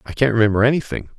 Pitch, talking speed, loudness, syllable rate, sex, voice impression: 120 Hz, 200 wpm, -17 LUFS, 7.8 syllables/s, male, masculine, middle-aged, thick, tensed, powerful, soft, clear, slightly nasal, cool, intellectual, calm, mature, friendly, reassuring, wild, slightly lively, kind